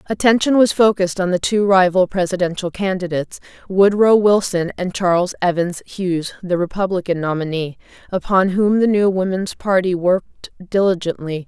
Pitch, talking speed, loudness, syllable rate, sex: 185 Hz, 135 wpm, -17 LUFS, 5.2 syllables/s, female